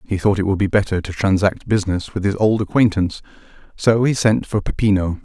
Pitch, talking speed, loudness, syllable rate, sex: 100 Hz, 205 wpm, -18 LUFS, 5.9 syllables/s, male